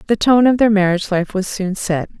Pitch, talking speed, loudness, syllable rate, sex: 200 Hz, 245 wpm, -16 LUFS, 5.7 syllables/s, female